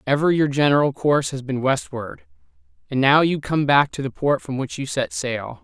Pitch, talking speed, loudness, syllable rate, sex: 140 Hz, 215 wpm, -20 LUFS, 5.1 syllables/s, male